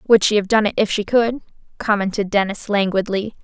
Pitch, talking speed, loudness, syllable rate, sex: 205 Hz, 190 wpm, -18 LUFS, 5.6 syllables/s, female